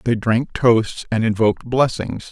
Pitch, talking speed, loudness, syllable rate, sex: 115 Hz, 155 wpm, -18 LUFS, 4.2 syllables/s, male